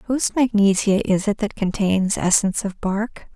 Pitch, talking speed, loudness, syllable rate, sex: 205 Hz, 160 wpm, -20 LUFS, 4.8 syllables/s, female